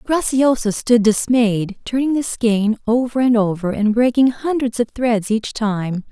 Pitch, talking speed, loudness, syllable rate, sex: 230 Hz, 155 wpm, -17 LUFS, 4.1 syllables/s, female